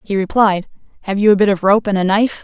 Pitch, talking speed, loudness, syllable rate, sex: 200 Hz, 270 wpm, -15 LUFS, 6.6 syllables/s, female